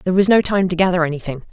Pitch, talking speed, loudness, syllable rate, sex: 175 Hz, 275 wpm, -17 LUFS, 8.0 syllables/s, female